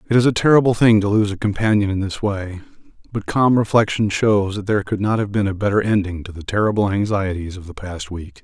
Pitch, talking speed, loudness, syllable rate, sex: 100 Hz, 235 wpm, -18 LUFS, 6.0 syllables/s, male